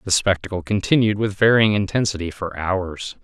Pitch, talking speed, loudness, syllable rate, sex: 100 Hz, 150 wpm, -20 LUFS, 5.2 syllables/s, male